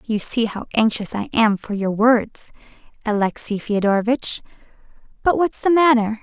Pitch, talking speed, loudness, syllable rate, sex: 230 Hz, 145 wpm, -19 LUFS, 4.7 syllables/s, female